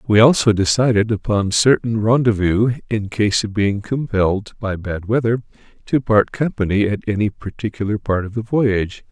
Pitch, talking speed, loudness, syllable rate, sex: 110 Hz, 160 wpm, -18 LUFS, 5.0 syllables/s, male